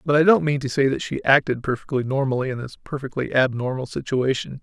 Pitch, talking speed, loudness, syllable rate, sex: 135 Hz, 210 wpm, -22 LUFS, 6.0 syllables/s, male